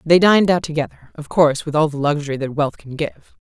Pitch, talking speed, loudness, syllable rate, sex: 155 Hz, 225 wpm, -18 LUFS, 6.3 syllables/s, female